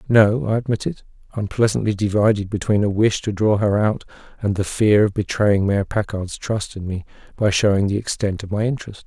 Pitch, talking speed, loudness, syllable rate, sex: 105 Hz, 190 wpm, -20 LUFS, 5.4 syllables/s, male